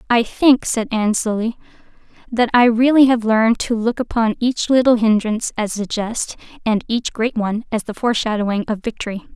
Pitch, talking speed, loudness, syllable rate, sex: 225 Hz, 180 wpm, -18 LUFS, 5.5 syllables/s, female